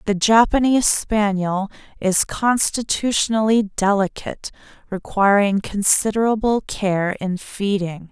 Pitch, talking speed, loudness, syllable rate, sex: 205 Hz, 80 wpm, -19 LUFS, 4.1 syllables/s, female